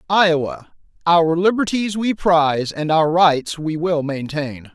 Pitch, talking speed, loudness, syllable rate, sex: 165 Hz, 125 wpm, -18 LUFS, 4.0 syllables/s, male